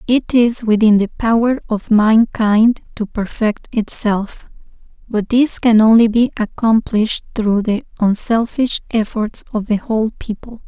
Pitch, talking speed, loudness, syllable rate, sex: 220 Hz, 135 wpm, -15 LUFS, 4.1 syllables/s, female